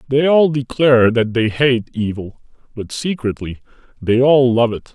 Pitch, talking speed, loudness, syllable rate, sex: 125 Hz, 160 wpm, -16 LUFS, 4.6 syllables/s, male